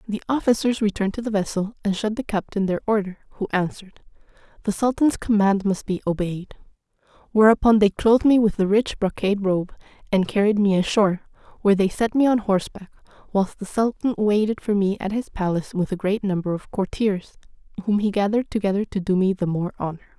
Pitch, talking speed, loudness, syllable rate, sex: 205 Hz, 190 wpm, -22 LUFS, 6.0 syllables/s, female